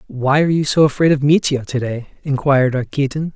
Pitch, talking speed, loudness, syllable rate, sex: 140 Hz, 195 wpm, -16 LUFS, 6.0 syllables/s, male